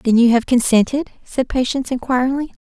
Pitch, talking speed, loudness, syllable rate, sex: 250 Hz, 160 wpm, -17 LUFS, 6.1 syllables/s, female